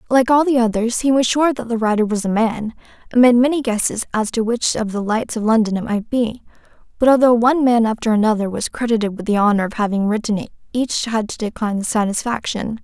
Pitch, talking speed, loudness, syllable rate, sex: 225 Hz, 230 wpm, -18 LUFS, 6.1 syllables/s, female